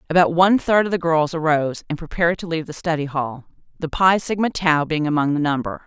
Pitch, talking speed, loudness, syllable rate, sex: 160 Hz, 225 wpm, -20 LUFS, 6.3 syllables/s, female